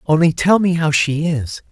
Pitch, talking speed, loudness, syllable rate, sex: 160 Hz, 210 wpm, -16 LUFS, 4.6 syllables/s, male